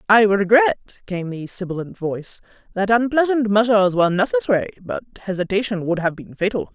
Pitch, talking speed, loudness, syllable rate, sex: 195 Hz, 150 wpm, -19 LUFS, 5.6 syllables/s, female